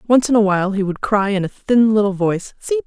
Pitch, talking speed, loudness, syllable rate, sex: 210 Hz, 270 wpm, -17 LUFS, 6.0 syllables/s, female